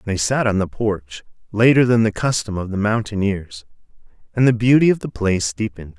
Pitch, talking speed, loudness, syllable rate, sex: 105 Hz, 190 wpm, -18 LUFS, 5.5 syllables/s, male